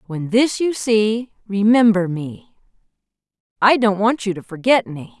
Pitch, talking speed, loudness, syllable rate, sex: 215 Hz, 150 wpm, -18 LUFS, 4.1 syllables/s, female